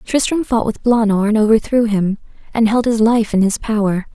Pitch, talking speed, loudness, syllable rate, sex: 220 Hz, 205 wpm, -16 LUFS, 5.2 syllables/s, female